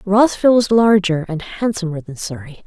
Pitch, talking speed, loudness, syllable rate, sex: 190 Hz, 160 wpm, -16 LUFS, 5.1 syllables/s, female